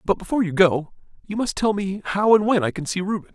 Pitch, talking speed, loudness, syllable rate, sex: 190 Hz, 270 wpm, -21 LUFS, 6.2 syllables/s, male